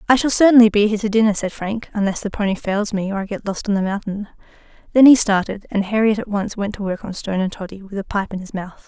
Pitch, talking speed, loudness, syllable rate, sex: 205 Hz, 275 wpm, -18 LUFS, 6.5 syllables/s, female